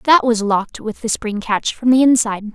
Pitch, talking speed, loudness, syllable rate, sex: 230 Hz, 235 wpm, -17 LUFS, 5.2 syllables/s, female